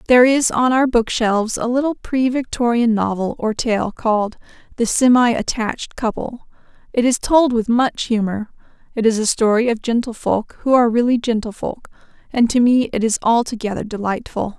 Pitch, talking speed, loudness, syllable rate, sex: 235 Hz, 170 wpm, -18 LUFS, 5.2 syllables/s, female